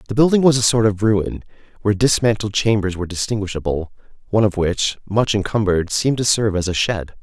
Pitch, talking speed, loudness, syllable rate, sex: 105 Hz, 190 wpm, -18 LUFS, 6.4 syllables/s, male